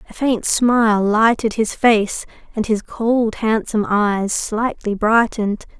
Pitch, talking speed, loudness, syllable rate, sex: 220 Hz, 135 wpm, -17 LUFS, 3.9 syllables/s, female